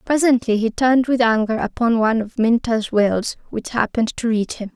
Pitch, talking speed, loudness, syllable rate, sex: 230 Hz, 190 wpm, -19 LUFS, 5.4 syllables/s, female